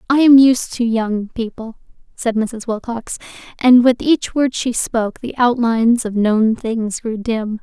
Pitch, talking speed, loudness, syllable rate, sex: 230 Hz, 175 wpm, -16 LUFS, 4.1 syllables/s, female